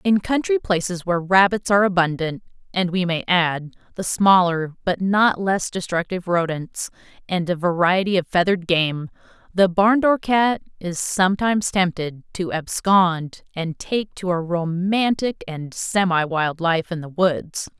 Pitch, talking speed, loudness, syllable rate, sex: 180 Hz, 145 wpm, -20 LUFS, 4.4 syllables/s, female